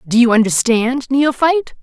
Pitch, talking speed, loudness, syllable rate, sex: 250 Hz, 130 wpm, -14 LUFS, 4.9 syllables/s, female